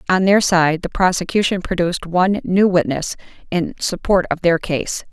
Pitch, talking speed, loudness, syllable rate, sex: 180 Hz, 165 wpm, -17 LUFS, 5.0 syllables/s, female